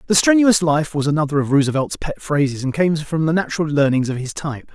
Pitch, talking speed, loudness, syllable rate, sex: 155 Hz, 225 wpm, -18 LUFS, 6.1 syllables/s, male